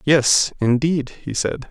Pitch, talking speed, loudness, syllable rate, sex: 140 Hz, 140 wpm, -19 LUFS, 3.3 syllables/s, male